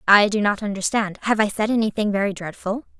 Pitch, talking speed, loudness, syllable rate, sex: 210 Hz, 200 wpm, -21 LUFS, 6.0 syllables/s, female